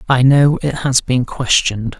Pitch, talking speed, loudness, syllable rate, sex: 130 Hz, 180 wpm, -14 LUFS, 4.5 syllables/s, male